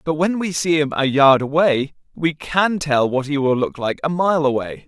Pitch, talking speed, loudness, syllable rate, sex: 150 Hz, 235 wpm, -18 LUFS, 4.7 syllables/s, male